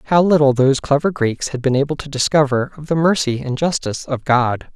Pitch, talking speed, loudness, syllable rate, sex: 140 Hz, 215 wpm, -17 LUFS, 5.8 syllables/s, male